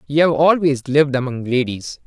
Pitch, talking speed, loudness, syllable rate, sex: 140 Hz, 175 wpm, -17 LUFS, 5.4 syllables/s, male